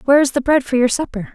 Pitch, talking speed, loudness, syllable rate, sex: 265 Hz, 310 wpm, -16 LUFS, 7.3 syllables/s, female